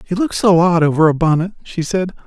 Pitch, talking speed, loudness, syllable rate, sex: 175 Hz, 240 wpm, -15 LUFS, 5.8 syllables/s, male